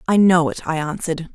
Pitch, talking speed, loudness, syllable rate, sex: 165 Hz, 225 wpm, -19 LUFS, 6.0 syllables/s, female